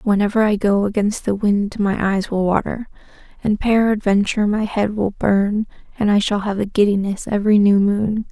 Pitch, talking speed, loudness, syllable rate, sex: 205 Hz, 180 wpm, -18 LUFS, 5.0 syllables/s, female